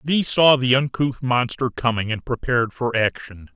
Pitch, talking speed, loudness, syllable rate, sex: 125 Hz, 170 wpm, -20 LUFS, 5.0 syllables/s, male